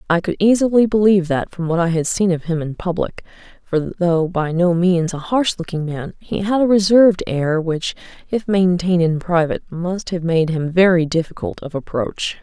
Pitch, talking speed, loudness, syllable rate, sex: 175 Hz, 200 wpm, -18 LUFS, 5.0 syllables/s, female